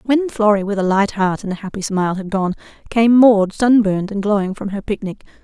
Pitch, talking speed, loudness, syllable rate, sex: 205 Hz, 220 wpm, -17 LUFS, 5.8 syllables/s, female